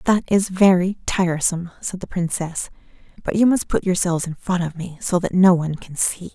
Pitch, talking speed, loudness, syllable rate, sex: 180 Hz, 210 wpm, -20 LUFS, 5.6 syllables/s, female